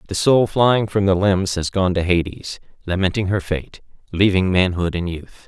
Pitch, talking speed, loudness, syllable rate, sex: 95 Hz, 185 wpm, -19 LUFS, 4.7 syllables/s, male